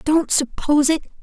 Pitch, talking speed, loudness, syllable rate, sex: 300 Hz, 145 wpm, -18 LUFS, 5.1 syllables/s, female